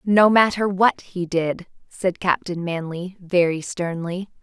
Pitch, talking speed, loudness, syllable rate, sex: 185 Hz, 135 wpm, -21 LUFS, 3.8 syllables/s, female